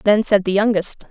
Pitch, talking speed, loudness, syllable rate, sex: 205 Hz, 215 wpm, -17 LUFS, 5.1 syllables/s, female